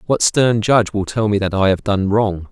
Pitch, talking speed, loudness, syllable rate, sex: 105 Hz, 260 wpm, -16 LUFS, 5.1 syllables/s, male